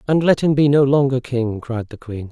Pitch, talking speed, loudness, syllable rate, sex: 130 Hz, 260 wpm, -17 LUFS, 5.1 syllables/s, male